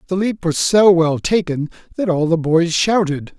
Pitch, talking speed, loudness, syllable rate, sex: 175 Hz, 195 wpm, -16 LUFS, 4.5 syllables/s, male